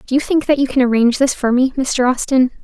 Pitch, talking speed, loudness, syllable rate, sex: 260 Hz, 275 wpm, -15 LUFS, 6.3 syllables/s, female